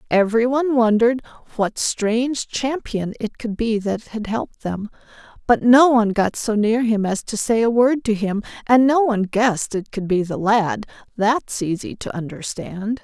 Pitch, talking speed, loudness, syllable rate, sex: 220 Hz, 185 wpm, -20 LUFS, 4.8 syllables/s, female